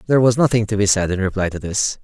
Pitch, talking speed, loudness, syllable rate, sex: 105 Hz, 295 wpm, -18 LUFS, 7.1 syllables/s, male